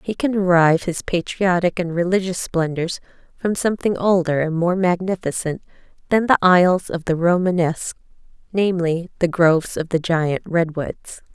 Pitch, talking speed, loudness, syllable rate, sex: 175 Hz, 145 wpm, -19 LUFS, 5.0 syllables/s, female